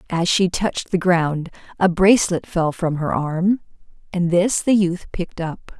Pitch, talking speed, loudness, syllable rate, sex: 175 Hz, 175 wpm, -20 LUFS, 4.4 syllables/s, female